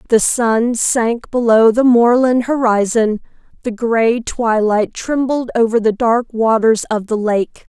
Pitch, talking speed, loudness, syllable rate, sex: 230 Hz, 140 wpm, -15 LUFS, 3.8 syllables/s, female